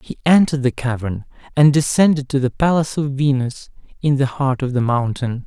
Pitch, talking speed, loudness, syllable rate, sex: 135 Hz, 185 wpm, -18 LUFS, 5.5 syllables/s, male